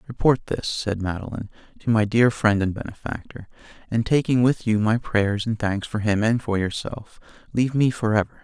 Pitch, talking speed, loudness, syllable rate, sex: 110 Hz, 190 wpm, -23 LUFS, 5.3 syllables/s, male